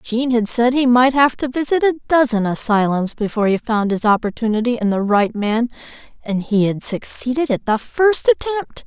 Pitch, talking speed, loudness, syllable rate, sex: 240 Hz, 190 wpm, -17 LUFS, 5.1 syllables/s, female